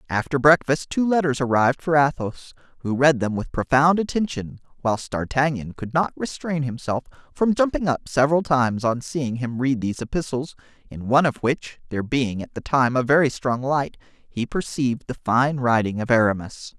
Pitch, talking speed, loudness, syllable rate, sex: 135 Hz, 180 wpm, -22 LUFS, 5.3 syllables/s, male